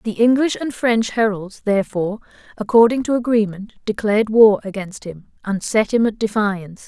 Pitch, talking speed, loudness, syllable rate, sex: 215 Hz, 155 wpm, -18 LUFS, 5.2 syllables/s, female